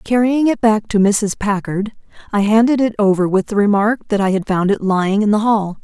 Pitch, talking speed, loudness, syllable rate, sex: 210 Hz, 225 wpm, -16 LUFS, 5.4 syllables/s, female